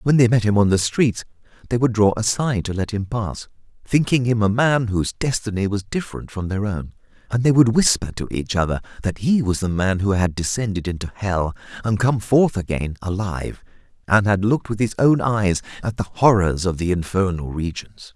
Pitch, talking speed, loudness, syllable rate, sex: 105 Hz, 205 wpm, -20 LUFS, 5.4 syllables/s, male